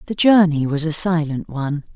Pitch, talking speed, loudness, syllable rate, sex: 160 Hz, 185 wpm, -18 LUFS, 5.3 syllables/s, female